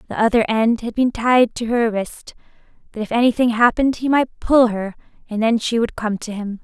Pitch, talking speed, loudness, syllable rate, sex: 230 Hz, 215 wpm, -18 LUFS, 5.3 syllables/s, female